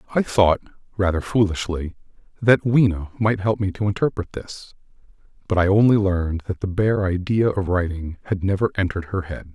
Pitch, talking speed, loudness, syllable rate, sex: 95 Hz, 170 wpm, -21 LUFS, 5.4 syllables/s, male